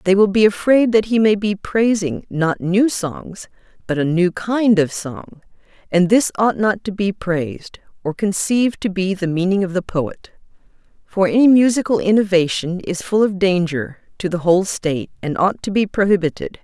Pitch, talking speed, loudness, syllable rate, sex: 190 Hz, 185 wpm, -18 LUFS, 4.8 syllables/s, female